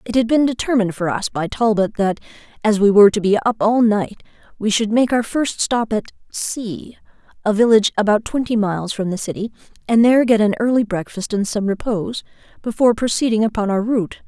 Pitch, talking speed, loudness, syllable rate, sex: 215 Hz, 200 wpm, -18 LUFS, 5.9 syllables/s, female